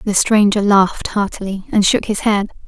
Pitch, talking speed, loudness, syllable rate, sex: 200 Hz, 180 wpm, -15 LUFS, 5.1 syllables/s, female